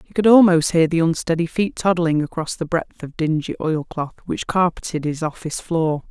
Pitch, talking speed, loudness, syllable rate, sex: 165 Hz, 185 wpm, -20 LUFS, 5.2 syllables/s, female